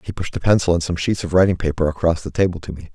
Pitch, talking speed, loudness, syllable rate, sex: 85 Hz, 305 wpm, -19 LUFS, 7.0 syllables/s, male